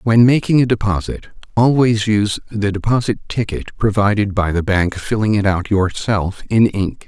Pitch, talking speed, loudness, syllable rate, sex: 105 Hz, 160 wpm, -17 LUFS, 4.9 syllables/s, male